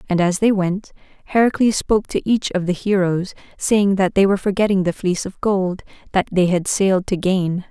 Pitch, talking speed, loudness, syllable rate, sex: 190 Hz, 200 wpm, -18 LUFS, 5.4 syllables/s, female